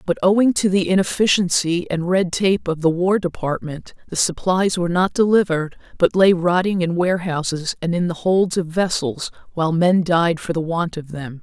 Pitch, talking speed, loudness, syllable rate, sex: 175 Hz, 190 wpm, -19 LUFS, 5.1 syllables/s, female